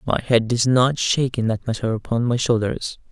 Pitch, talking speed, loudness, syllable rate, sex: 120 Hz, 210 wpm, -20 LUFS, 5.3 syllables/s, male